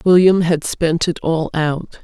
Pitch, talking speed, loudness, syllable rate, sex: 165 Hz, 175 wpm, -16 LUFS, 3.7 syllables/s, female